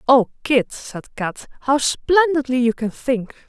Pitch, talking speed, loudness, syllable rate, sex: 260 Hz, 155 wpm, -19 LUFS, 3.8 syllables/s, female